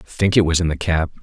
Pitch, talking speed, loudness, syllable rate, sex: 85 Hz, 340 wpm, -18 LUFS, 6.5 syllables/s, male